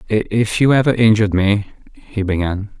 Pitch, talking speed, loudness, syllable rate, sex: 105 Hz, 150 wpm, -16 LUFS, 4.6 syllables/s, male